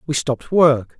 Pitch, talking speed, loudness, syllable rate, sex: 145 Hz, 180 wpm, -17 LUFS, 4.7 syllables/s, male